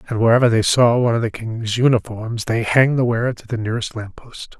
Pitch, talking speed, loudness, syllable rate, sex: 115 Hz, 235 wpm, -18 LUFS, 6.2 syllables/s, male